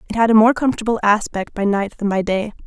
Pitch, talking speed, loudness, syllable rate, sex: 215 Hz, 245 wpm, -17 LUFS, 6.6 syllables/s, female